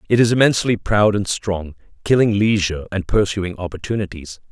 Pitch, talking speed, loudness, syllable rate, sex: 100 Hz, 145 wpm, -18 LUFS, 5.7 syllables/s, male